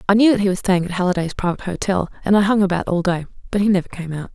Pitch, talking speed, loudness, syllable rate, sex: 190 Hz, 290 wpm, -19 LUFS, 7.4 syllables/s, female